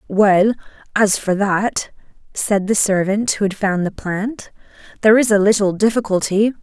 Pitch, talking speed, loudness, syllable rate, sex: 205 Hz, 155 wpm, -17 LUFS, 4.5 syllables/s, female